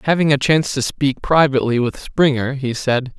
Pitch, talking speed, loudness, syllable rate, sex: 135 Hz, 190 wpm, -17 LUFS, 5.3 syllables/s, male